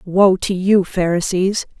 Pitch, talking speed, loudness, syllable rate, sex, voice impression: 185 Hz, 135 wpm, -16 LUFS, 3.8 syllables/s, female, feminine, adult-like, slightly tensed, slightly powerful, bright, slightly soft, raspy, calm, friendly, reassuring, elegant, slightly lively, kind